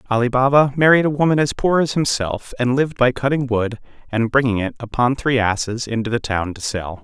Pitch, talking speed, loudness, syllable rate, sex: 125 Hz, 215 wpm, -18 LUFS, 5.7 syllables/s, male